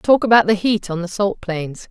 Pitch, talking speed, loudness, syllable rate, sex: 195 Hz, 250 wpm, -18 LUFS, 4.8 syllables/s, female